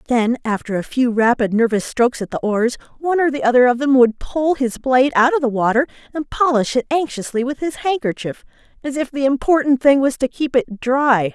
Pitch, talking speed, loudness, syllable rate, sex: 255 Hz, 215 wpm, -17 LUFS, 5.6 syllables/s, female